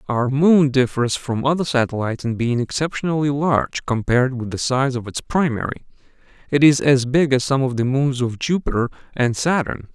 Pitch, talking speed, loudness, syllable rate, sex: 135 Hz, 180 wpm, -19 LUFS, 5.3 syllables/s, male